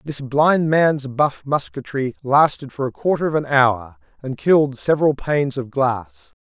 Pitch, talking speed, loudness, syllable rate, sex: 135 Hz, 170 wpm, -19 LUFS, 4.4 syllables/s, male